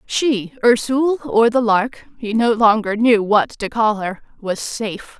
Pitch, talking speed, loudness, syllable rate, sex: 225 Hz, 175 wpm, -17 LUFS, 4.1 syllables/s, female